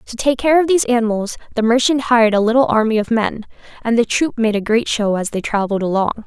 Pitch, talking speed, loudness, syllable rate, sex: 230 Hz, 240 wpm, -16 LUFS, 6.3 syllables/s, female